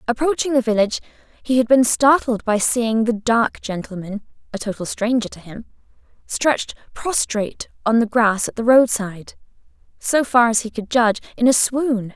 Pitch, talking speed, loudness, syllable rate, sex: 230 Hz, 165 wpm, -19 LUFS, 5.1 syllables/s, female